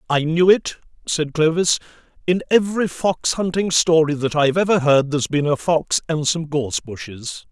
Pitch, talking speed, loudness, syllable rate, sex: 160 Hz, 175 wpm, -19 LUFS, 5.0 syllables/s, male